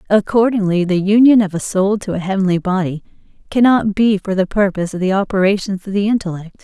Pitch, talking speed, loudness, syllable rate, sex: 195 Hz, 190 wpm, -16 LUFS, 6.1 syllables/s, female